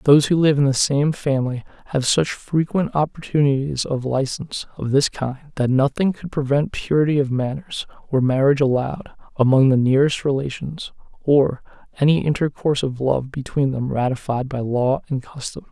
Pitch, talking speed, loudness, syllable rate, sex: 140 Hz, 160 wpm, -20 LUFS, 5.4 syllables/s, male